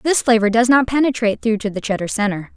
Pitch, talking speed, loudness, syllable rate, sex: 230 Hz, 235 wpm, -17 LUFS, 6.5 syllables/s, female